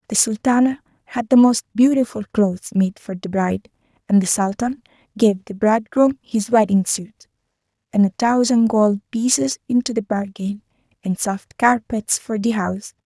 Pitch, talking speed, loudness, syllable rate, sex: 220 Hz, 155 wpm, -19 LUFS, 4.9 syllables/s, female